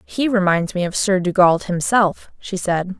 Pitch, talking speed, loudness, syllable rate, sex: 185 Hz, 180 wpm, -18 LUFS, 4.3 syllables/s, female